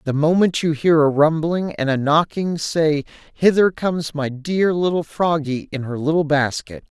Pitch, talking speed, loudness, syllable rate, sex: 155 Hz, 170 wpm, -19 LUFS, 4.5 syllables/s, male